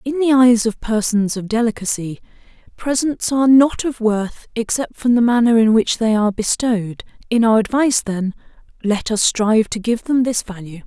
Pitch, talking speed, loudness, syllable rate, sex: 230 Hz, 180 wpm, -17 LUFS, 5.1 syllables/s, female